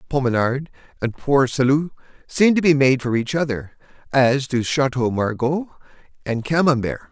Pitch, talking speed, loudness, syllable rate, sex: 135 Hz, 145 wpm, -20 LUFS, 4.4 syllables/s, male